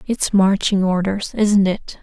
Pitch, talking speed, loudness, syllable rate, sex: 195 Hz, 150 wpm, -17 LUFS, 3.7 syllables/s, female